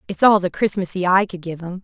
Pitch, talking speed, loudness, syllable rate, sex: 185 Hz, 260 wpm, -19 LUFS, 6.1 syllables/s, female